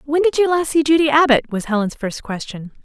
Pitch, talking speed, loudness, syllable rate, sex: 275 Hz, 230 wpm, -17 LUFS, 5.9 syllables/s, female